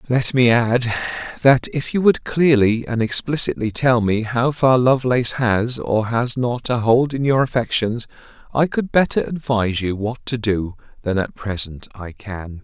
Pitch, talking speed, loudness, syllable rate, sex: 120 Hz, 175 wpm, -19 LUFS, 4.5 syllables/s, male